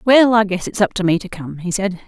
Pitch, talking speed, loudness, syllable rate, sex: 195 Hz, 320 wpm, -17 LUFS, 5.7 syllables/s, female